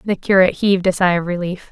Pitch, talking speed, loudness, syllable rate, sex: 185 Hz, 245 wpm, -16 LUFS, 6.8 syllables/s, female